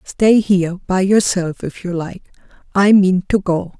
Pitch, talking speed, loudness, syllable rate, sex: 190 Hz, 175 wpm, -16 LUFS, 4.2 syllables/s, female